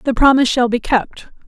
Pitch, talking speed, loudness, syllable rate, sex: 250 Hz, 205 wpm, -15 LUFS, 5.3 syllables/s, female